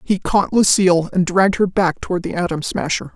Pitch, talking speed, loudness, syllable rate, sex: 180 Hz, 210 wpm, -17 LUFS, 5.6 syllables/s, female